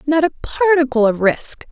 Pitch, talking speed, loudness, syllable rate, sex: 285 Hz, 175 wpm, -16 LUFS, 4.9 syllables/s, female